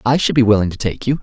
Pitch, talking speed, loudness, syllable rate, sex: 115 Hz, 345 wpm, -16 LUFS, 7.1 syllables/s, male